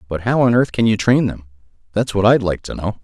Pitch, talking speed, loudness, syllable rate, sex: 105 Hz, 275 wpm, -17 LUFS, 6.0 syllables/s, male